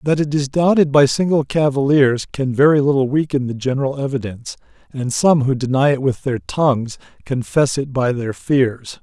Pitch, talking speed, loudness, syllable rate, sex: 135 Hz, 180 wpm, -17 LUFS, 5.1 syllables/s, male